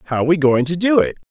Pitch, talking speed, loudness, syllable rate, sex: 160 Hz, 275 wpm, -16 LUFS, 6.3 syllables/s, male